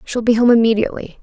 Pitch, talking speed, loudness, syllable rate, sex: 225 Hz, 195 wpm, -15 LUFS, 7.1 syllables/s, female